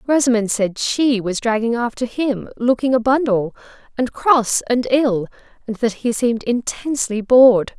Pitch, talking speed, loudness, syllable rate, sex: 235 Hz, 140 wpm, -18 LUFS, 4.6 syllables/s, female